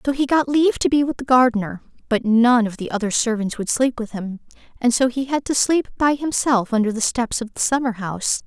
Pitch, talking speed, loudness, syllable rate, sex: 240 Hz, 240 wpm, -19 LUFS, 5.7 syllables/s, female